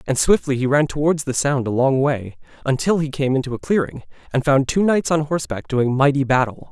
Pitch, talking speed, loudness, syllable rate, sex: 140 Hz, 225 wpm, -19 LUFS, 5.7 syllables/s, male